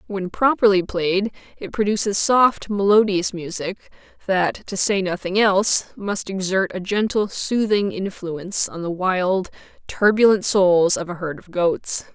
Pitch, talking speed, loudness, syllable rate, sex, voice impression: 195 Hz, 145 wpm, -20 LUFS, 4.2 syllables/s, female, feminine, adult-like, tensed, powerful, bright, clear, fluent, intellectual, elegant, lively, slightly strict, slightly sharp